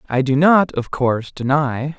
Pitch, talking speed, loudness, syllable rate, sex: 140 Hz, 180 wpm, -17 LUFS, 4.6 syllables/s, male